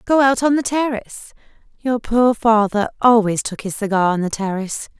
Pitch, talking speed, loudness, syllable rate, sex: 225 Hz, 180 wpm, -18 LUFS, 5.2 syllables/s, female